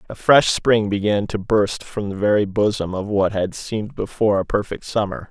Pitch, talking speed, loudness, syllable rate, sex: 105 Hz, 205 wpm, -20 LUFS, 5.1 syllables/s, male